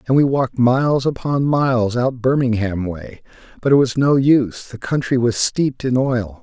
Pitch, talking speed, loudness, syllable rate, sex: 125 Hz, 185 wpm, -17 LUFS, 4.9 syllables/s, male